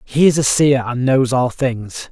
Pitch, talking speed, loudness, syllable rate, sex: 130 Hz, 225 wpm, -16 LUFS, 4.0 syllables/s, male